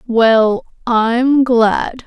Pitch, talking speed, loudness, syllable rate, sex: 235 Hz, 85 wpm, -14 LUFS, 1.8 syllables/s, female